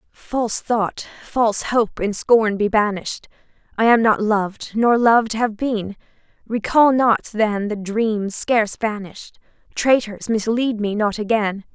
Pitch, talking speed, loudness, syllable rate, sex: 220 Hz, 130 wpm, -19 LUFS, 4.2 syllables/s, female